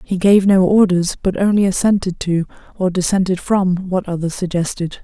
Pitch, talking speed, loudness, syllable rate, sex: 185 Hz, 165 wpm, -16 LUFS, 5.0 syllables/s, female